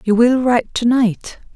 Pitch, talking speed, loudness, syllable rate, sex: 235 Hz, 195 wpm, -15 LUFS, 4.6 syllables/s, female